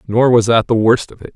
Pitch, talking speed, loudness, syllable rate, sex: 115 Hz, 310 wpm, -13 LUFS, 5.9 syllables/s, male